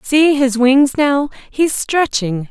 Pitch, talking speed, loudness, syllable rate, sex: 270 Hz, 120 wpm, -14 LUFS, 3.1 syllables/s, female